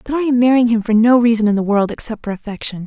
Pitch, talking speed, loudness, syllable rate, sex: 230 Hz, 275 wpm, -15 LUFS, 6.5 syllables/s, female